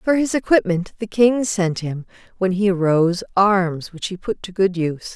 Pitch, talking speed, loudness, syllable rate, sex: 190 Hz, 200 wpm, -19 LUFS, 4.8 syllables/s, female